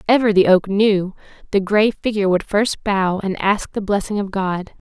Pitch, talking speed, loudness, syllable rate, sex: 200 Hz, 195 wpm, -18 LUFS, 4.7 syllables/s, female